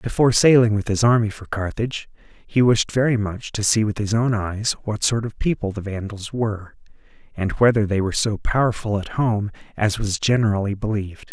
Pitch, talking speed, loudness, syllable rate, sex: 105 Hz, 190 wpm, -21 LUFS, 5.5 syllables/s, male